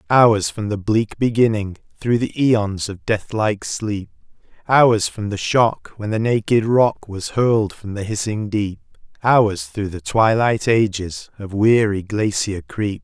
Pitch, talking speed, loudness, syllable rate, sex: 105 Hz, 160 wpm, -19 LUFS, 3.8 syllables/s, male